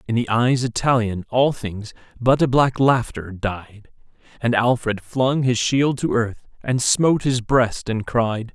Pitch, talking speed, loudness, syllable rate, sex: 120 Hz, 170 wpm, -20 LUFS, 3.9 syllables/s, male